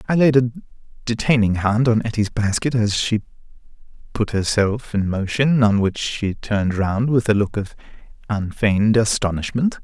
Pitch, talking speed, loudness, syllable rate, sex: 110 Hz, 155 wpm, -19 LUFS, 4.8 syllables/s, male